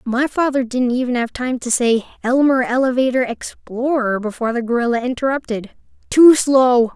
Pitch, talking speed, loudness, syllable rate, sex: 250 Hz, 145 wpm, -17 LUFS, 5.0 syllables/s, female